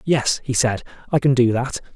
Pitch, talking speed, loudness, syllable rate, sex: 130 Hz, 215 wpm, -20 LUFS, 5.1 syllables/s, male